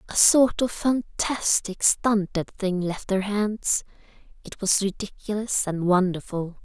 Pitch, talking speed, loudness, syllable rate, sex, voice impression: 200 Hz, 125 wpm, -23 LUFS, 3.8 syllables/s, female, feminine, slightly adult-like, slightly relaxed, soft, slightly cute, calm, friendly